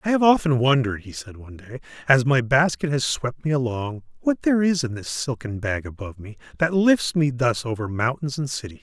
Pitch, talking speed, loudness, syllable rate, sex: 135 Hz, 220 wpm, -22 LUFS, 5.7 syllables/s, male